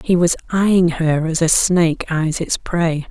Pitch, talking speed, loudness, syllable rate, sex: 165 Hz, 195 wpm, -17 LUFS, 4.4 syllables/s, female